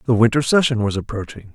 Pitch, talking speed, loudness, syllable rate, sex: 120 Hz, 195 wpm, -18 LUFS, 6.5 syllables/s, male